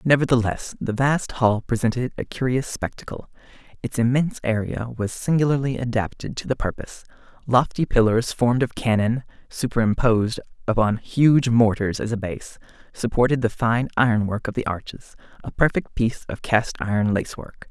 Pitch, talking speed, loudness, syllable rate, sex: 120 Hz, 145 wpm, -22 LUFS, 5.2 syllables/s, male